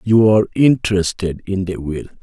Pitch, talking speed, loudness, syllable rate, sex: 100 Hz, 160 wpm, -17 LUFS, 5.4 syllables/s, male